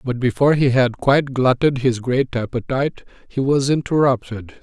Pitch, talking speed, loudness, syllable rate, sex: 130 Hz, 155 wpm, -18 LUFS, 5.4 syllables/s, male